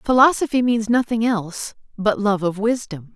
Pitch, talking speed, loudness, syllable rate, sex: 220 Hz, 150 wpm, -19 LUFS, 5.0 syllables/s, female